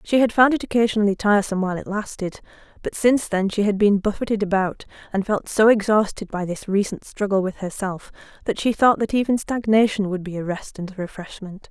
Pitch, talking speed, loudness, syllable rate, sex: 205 Hz, 205 wpm, -21 LUFS, 5.9 syllables/s, female